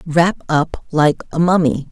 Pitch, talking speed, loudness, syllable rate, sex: 160 Hz, 155 wpm, -16 LUFS, 3.8 syllables/s, female